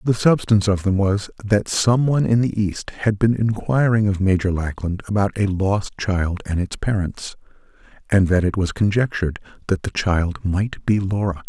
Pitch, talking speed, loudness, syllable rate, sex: 100 Hz, 185 wpm, -20 LUFS, 4.8 syllables/s, male